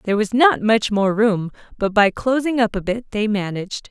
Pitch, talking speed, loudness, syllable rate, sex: 215 Hz, 215 wpm, -19 LUFS, 5.2 syllables/s, female